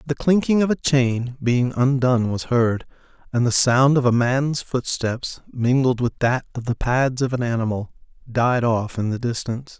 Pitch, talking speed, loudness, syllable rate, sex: 125 Hz, 185 wpm, -21 LUFS, 4.6 syllables/s, male